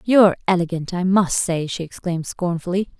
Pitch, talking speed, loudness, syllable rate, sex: 180 Hz, 160 wpm, -20 LUFS, 5.5 syllables/s, female